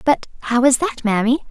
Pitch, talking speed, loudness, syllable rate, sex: 255 Hz, 200 wpm, -18 LUFS, 5.5 syllables/s, female